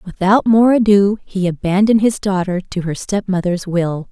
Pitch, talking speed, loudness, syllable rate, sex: 195 Hz, 160 wpm, -15 LUFS, 4.9 syllables/s, female